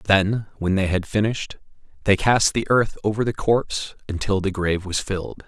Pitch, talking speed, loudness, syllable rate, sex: 100 Hz, 185 wpm, -22 LUFS, 5.3 syllables/s, male